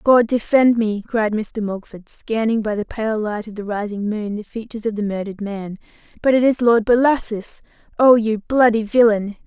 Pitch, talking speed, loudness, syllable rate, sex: 220 Hz, 185 wpm, -19 LUFS, 5.0 syllables/s, female